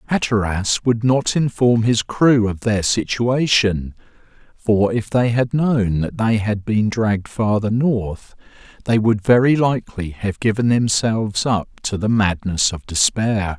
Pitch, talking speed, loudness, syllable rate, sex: 110 Hz, 150 wpm, -18 LUFS, 4.0 syllables/s, male